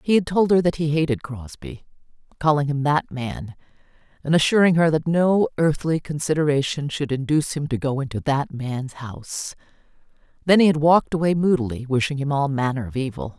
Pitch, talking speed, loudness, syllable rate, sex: 150 Hz, 175 wpm, -21 LUFS, 5.5 syllables/s, female